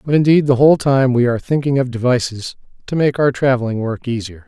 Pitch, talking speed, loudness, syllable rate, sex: 130 Hz, 215 wpm, -16 LUFS, 6.1 syllables/s, male